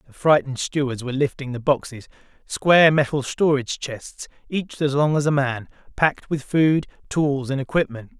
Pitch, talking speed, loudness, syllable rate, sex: 140 Hz, 170 wpm, -21 LUFS, 5.2 syllables/s, male